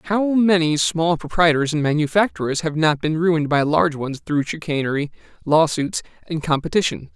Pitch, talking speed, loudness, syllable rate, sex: 160 Hz, 160 wpm, -20 LUFS, 5.2 syllables/s, male